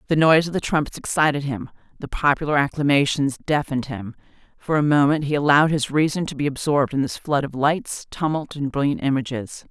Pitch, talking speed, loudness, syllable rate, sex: 145 Hz, 185 wpm, -21 LUFS, 6.0 syllables/s, female